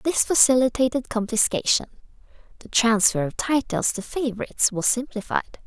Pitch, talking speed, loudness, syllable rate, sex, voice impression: 235 Hz, 115 wpm, -22 LUFS, 5.2 syllables/s, female, feminine, adult-like, relaxed, weak, soft, raspy, calm, slightly friendly, reassuring, kind, modest